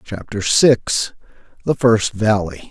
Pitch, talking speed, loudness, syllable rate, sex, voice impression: 110 Hz, 110 wpm, -17 LUFS, 3.3 syllables/s, male, very masculine, very adult-like, middle-aged, thick, slightly tensed, powerful, bright, slightly soft, clear, fluent, cool, very intellectual, slightly refreshing, very sincere, very calm, mature, very friendly, very reassuring, slightly unique, elegant, slightly sweet, slightly lively, kind